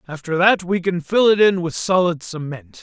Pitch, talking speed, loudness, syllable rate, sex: 175 Hz, 215 wpm, -18 LUFS, 4.9 syllables/s, male